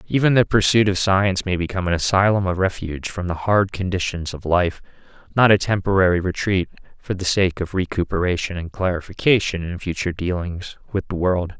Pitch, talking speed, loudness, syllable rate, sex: 95 Hz, 170 wpm, -20 LUFS, 5.7 syllables/s, male